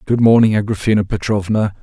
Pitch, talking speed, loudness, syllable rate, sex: 105 Hz, 130 wpm, -15 LUFS, 6.0 syllables/s, male